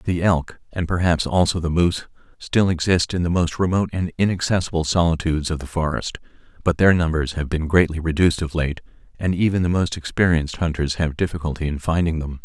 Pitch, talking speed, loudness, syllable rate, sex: 85 Hz, 190 wpm, -21 LUFS, 5.9 syllables/s, male